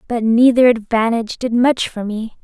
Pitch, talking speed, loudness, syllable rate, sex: 230 Hz, 170 wpm, -15 LUFS, 5.1 syllables/s, female